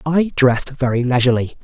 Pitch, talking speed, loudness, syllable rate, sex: 135 Hz, 145 wpm, -16 LUFS, 6.3 syllables/s, male